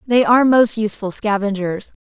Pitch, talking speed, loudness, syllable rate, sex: 215 Hz, 150 wpm, -16 LUFS, 5.5 syllables/s, female